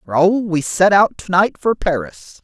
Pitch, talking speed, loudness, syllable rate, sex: 170 Hz, 195 wpm, -16 LUFS, 3.9 syllables/s, male